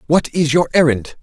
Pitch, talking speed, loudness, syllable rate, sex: 150 Hz, 195 wpm, -15 LUFS, 5.0 syllables/s, male